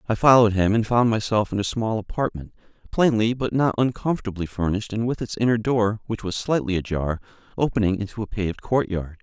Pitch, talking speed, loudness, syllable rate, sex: 110 Hz, 190 wpm, -23 LUFS, 6.0 syllables/s, male